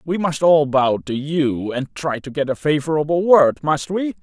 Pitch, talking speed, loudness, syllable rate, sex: 150 Hz, 215 wpm, -18 LUFS, 4.4 syllables/s, male